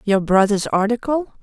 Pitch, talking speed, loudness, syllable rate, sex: 220 Hz, 125 wpm, -18 LUFS, 4.7 syllables/s, female